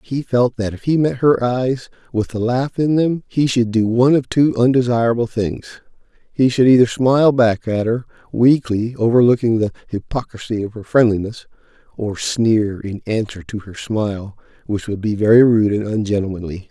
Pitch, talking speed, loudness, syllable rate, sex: 115 Hz, 170 wpm, -17 LUFS, 5.0 syllables/s, male